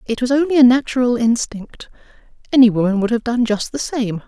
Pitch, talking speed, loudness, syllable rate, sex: 240 Hz, 195 wpm, -16 LUFS, 5.7 syllables/s, female